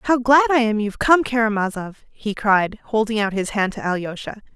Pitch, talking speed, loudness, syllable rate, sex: 220 Hz, 200 wpm, -19 LUFS, 5.2 syllables/s, female